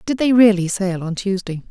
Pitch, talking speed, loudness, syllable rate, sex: 200 Hz, 210 wpm, -17 LUFS, 5.1 syllables/s, female